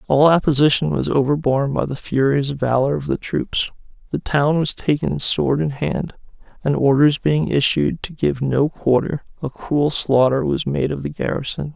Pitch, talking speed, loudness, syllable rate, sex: 145 Hz, 175 wpm, -19 LUFS, 4.7 syllables/s, male